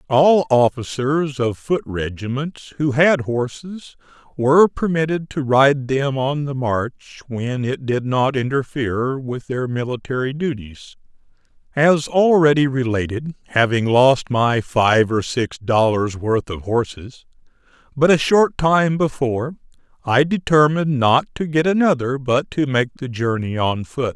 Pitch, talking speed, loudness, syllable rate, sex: 135 Hz, 140 wpm, -18 LUFS, 4.1 syllables/s, male